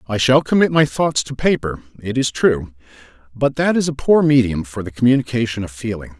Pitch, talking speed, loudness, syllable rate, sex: 120 Hz, 205 wpm, -17 LUFS, 5.6 syllables/s, male